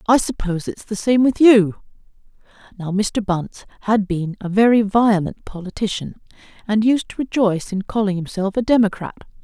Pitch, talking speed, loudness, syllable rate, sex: 205 Hz, 160 wpm, -18 LUFS, 5.2 syllables/s, female